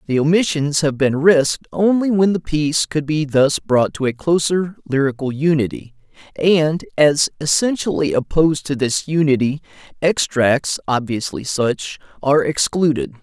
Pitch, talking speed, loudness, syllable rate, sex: 150 Hz, 135 wpm, -17 LUFS, 4.6 syllables/s, male